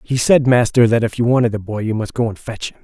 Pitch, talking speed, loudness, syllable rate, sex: 115 Hz, 320 wpm, -16 LUFS, 6.2 syllables/s, male